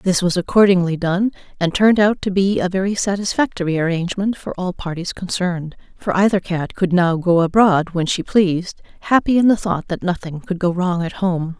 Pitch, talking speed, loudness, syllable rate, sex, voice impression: 185 Hz, 195 wpm, -18 LUFS, 5.3 syllables/s, female, feminine, adult-like, slightly soft, slightly sincere, calm, slightly sweet